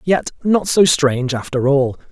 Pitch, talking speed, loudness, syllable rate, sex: 150 Hz, 170 wpm, -16 LUFS, 4.5 syllables/s, male